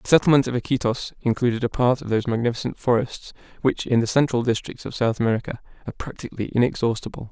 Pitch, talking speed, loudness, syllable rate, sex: 120 Hz, 180 wpm, -23 LUFS, 6.9 syllables/s, male